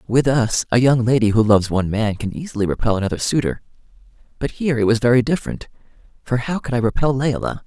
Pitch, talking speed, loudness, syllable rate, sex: 120 Hz, 205 wpm, -19 LUFS, 6.7 syllables/s, male